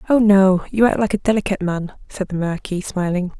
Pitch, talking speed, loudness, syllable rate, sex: 195 Hz, 210 wpm, -18 LUFS, 6.1 syllables/s, female